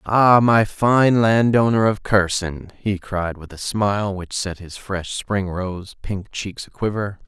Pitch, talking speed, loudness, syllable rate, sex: 100 Hz, 175 wpm, -20 LUFS, 3.7 syllables/s, male